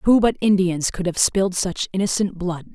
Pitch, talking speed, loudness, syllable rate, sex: 185 Hz, 195 wpm, -20 LUFS, 4.9 syllables/s, female